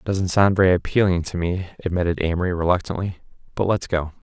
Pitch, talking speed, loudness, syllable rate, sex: 90 Hz, 165 wpm, -21 LUFS, 6.3 syllables/s, male